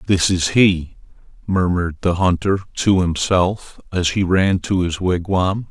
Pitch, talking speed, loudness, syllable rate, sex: 90 Hz, 145 wpm, -18 LUFS, 4.0 syllables/s, male